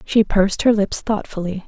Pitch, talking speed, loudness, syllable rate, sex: 200 Hz, 180 wpm, -19 LUFS, 5.1 syllables/s, female